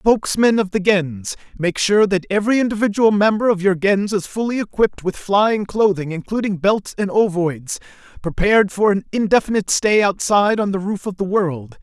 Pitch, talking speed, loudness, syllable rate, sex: 200 Hz, 175 wpm, -18 LUFS, 5.3 syllables/s, male